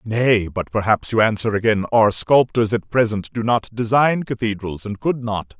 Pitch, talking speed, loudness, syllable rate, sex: 110 Hz, 180 wpm, -19 LUFS, 4.7 syllables/s, male